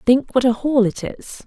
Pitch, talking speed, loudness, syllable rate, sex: 250 Hz, 245 wpm, -18 LUFS, 4.5 syllables/s, female